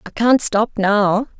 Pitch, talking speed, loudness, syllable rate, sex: 215 Hz, 170 wpm, -16 LUFS, 3.6 syllables/s, female